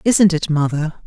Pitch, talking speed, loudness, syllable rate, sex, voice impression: 165 Hz, 170 wpm, -17 LUFS, 4.6 syllables/s, male, masculine, adult-like, relaxed, weak, soft, fluent, calm, friendly, reassuring, kind, modest